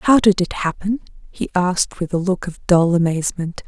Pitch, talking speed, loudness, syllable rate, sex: 180 Hz, 195 wpm, -19 LUFS, 5.3 syllables/s, female